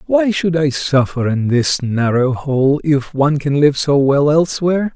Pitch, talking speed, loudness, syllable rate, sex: 145 Hz, 180 wpm, -15 LUFS, 4.4 syllables/s, male